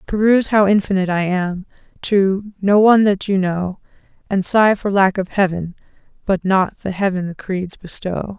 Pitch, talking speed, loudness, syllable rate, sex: 195 Hz, 170 wpm, -17 LUFS, 4.9 syllables/s, female